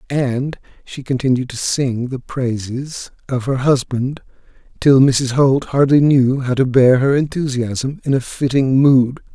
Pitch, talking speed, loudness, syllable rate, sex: 130 Hz, 155 wpm, -16 LUFS, 4.0 syllables/s, male